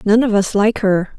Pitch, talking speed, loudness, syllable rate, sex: 210 Hz, 255 wpm, -15 LUFS, 4.8 syllables/s, female